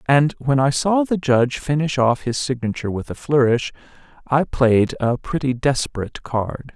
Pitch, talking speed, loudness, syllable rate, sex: 135 Hz, 170 wpm, -20 LUFS, 4.9 syllables/s, male